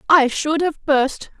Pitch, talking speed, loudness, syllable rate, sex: 295 Hz, 170 wpm, -18 LUFS, 3.5 syllables/s, female